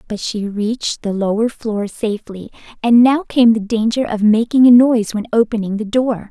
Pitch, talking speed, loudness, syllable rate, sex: 225 Hz, 190 wpm, -15 LUFS, 5.1 syllables/s, female